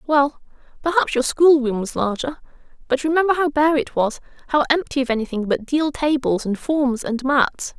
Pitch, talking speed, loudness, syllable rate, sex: 275 Hz, 175 wpm, -20 LUFS, 5.1 syllables/s, female